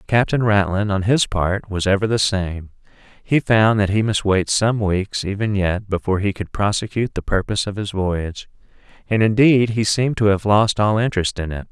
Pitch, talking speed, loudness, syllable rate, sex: 100 Hz, 200 wpm, -19 LUFS, 5.2 syllables/s, male